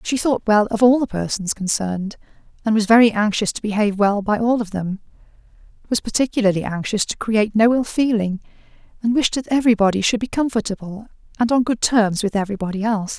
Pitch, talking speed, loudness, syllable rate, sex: 215 Hz, 180 wpm, -19 LUFS, 6.2 syllables/s, female